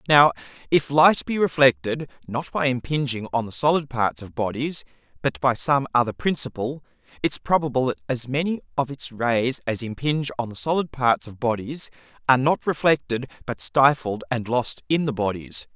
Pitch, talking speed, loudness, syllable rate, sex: 130 Hz, 170 wpm, -23 LUFS, 5.0 syllables/s, male